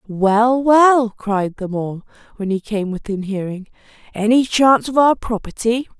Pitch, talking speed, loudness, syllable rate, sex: 220 Hz, 150 wpm, -17 LUFS, 4.2 syllables/s, female